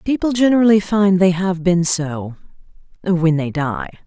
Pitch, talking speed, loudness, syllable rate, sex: 185 Hz, 135 wpm, -16 LUFS, 4.4 syllables/s, female